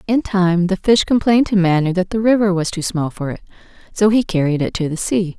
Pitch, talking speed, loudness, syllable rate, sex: 190 Hz, 245 wpm, -17 LUFS, 5.7 syllables/s, female